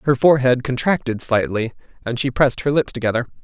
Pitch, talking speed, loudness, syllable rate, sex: 130 Hz, 175 wpm, -19 LUFS, 6.3 syllables/s, male